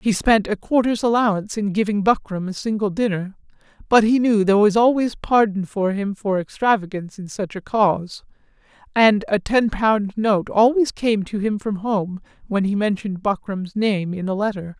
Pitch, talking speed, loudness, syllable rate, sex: 205 Hz, 180 wpm, -20 LUFS, 5.0 syllables/s, male